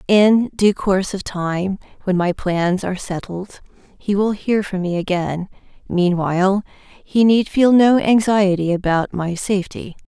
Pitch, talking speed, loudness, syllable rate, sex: 195 Hz, 150 wpm, -18 LUFS, 4.1 syllables/s, female